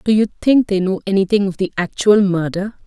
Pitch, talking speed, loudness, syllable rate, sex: 195 Hz, 210 wpm, -16 LUFS, 5.7 syllables/s, female